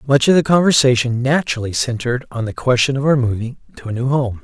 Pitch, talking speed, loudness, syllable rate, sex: 130 Hz, 215 wpm, -16 LUFS, 6.4 syllables/s, male